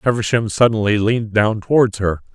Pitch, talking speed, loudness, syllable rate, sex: 110 Hz, 155 wpm, -17 LUFS, 5.4 syllables/s, male